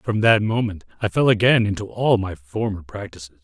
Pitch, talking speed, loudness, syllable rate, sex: 105 Hz, 190 wpm, -20 LUFS, 5.3 syllables/s, male